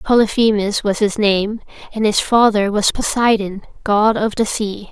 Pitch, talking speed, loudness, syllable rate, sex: 210 Hz, 160 wpm, -16 LUFS, 4.5 syllables/s, female